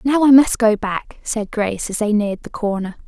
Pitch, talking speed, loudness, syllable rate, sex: 220 Hz, 235 wpm, -18 LUFS, 5.2 syllables/s, female